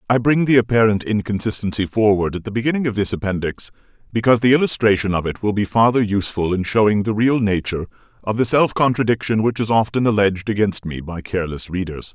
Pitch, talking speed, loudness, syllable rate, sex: 105 Hz, 195 wpm, -19 LUFS, 6.3 syllables/s, male